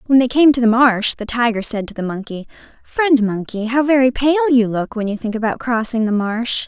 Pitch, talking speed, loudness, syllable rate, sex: 240 Hz, 235 wpm, -17 LUFS, 5.2 syllables/s, female